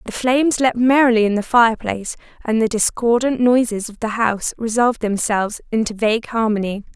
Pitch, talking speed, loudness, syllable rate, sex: 230 Hz, 165 wpm, -18 LUFS, 6.0 syllables/s, female